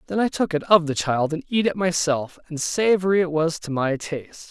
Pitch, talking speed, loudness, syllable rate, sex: 165 Hz, 240 wpm, -22 LUFS, 5.3 syllables/s, male